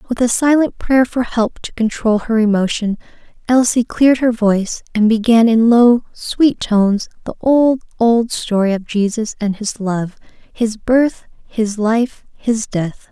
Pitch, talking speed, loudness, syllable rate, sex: 225 Hz, 160 wpm, -15 LUFS, 4.1 syllables/s, female